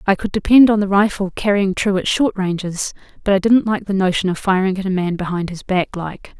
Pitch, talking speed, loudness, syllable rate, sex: 195 Hz, 245 wpm, -17 LUFS, 5.6 syllables/s, female